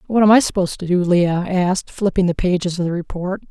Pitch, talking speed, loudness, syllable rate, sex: 185 Hz, 240 wpm, -18 LUFS, 6.1 syllables/s, female